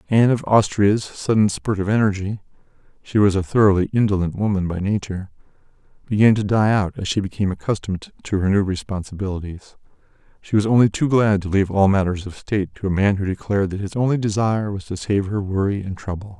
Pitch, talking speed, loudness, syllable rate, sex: 100 Hz, 190 wpm, -20 LUFS, 6.3 syllables/s, male